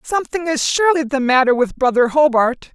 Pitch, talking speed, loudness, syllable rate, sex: 280 Hz, 175 wpm, -16 LUFS, 5.7 syllables/s, female